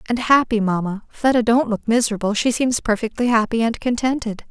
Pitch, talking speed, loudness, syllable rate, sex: 230 Hz, 145 wpm, -19 LUFS, 5.6 syllables/s, female